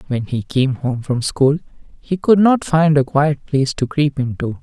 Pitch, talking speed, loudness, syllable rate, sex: 140 Hz, 210 wpm, -17 LUFS, 4.5 syllables/s, male